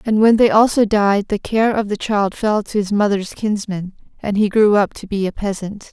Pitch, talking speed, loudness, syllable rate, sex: 205 Hz, 235 wpm, -17 LUFS, 4.9 syllables/s, female